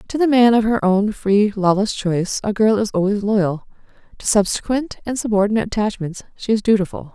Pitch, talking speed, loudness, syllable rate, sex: 210 Hz, 185 wpm, -18 LUFS, 5.6 syllables/s, female